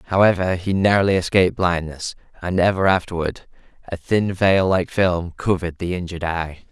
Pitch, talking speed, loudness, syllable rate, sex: 90 Hz, 150 wpm, -20 LUFS, 5.2 syllables/s, male